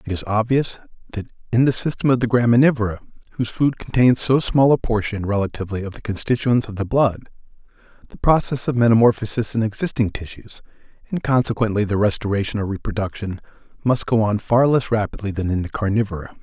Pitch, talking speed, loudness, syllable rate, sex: 110 Hz, 170 wpm, -20 LUFS, 6.2 syllables/s, male